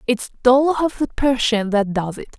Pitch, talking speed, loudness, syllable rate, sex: 240 Hz, 175 wpm, -19 LUFS, 5.2 syllables/s, female